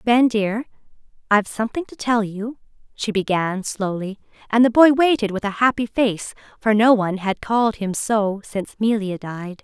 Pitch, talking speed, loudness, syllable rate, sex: 215 Hz, 175 wpm, -20 LUFS, 5.0 syllables/s, female